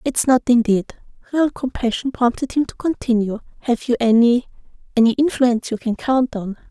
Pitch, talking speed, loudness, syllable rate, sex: 245 Hz, 150 wpm, -19 LUFS, 5.2 syllables/s, female